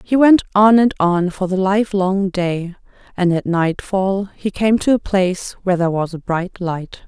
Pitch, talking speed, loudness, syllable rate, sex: 190 Hz, 195 wpm, -17 LUFS, 4.7 syllables/s, female